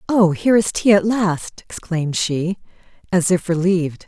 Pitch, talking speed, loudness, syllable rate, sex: 185 Hz, 160 wpm, -18 LUFS, 4.8 syllables/s, female